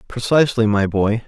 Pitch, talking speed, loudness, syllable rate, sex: 115 Hz, 140 wpm, -17 LUFS, 5.5 syllables/s, male